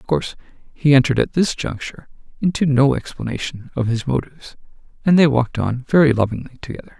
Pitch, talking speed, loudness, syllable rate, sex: 135 Hz, 170 wpm, -18 LUFS, 6.3 syllables/s, male